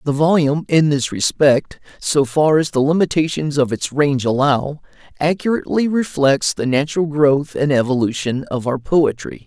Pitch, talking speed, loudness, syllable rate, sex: 145 Hz, 150 wpm, -17 LUFS, 4.9 syllables/s, male